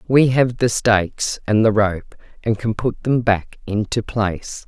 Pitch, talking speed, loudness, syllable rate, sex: 110 Hz, 180 wpm, -19 LUFS, 4.1 syllables/s, female